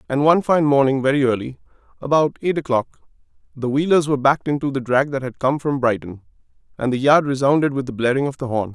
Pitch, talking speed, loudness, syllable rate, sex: 135 Hz, 200 wpm, -19 LUFS, 6.3 syllables/s, male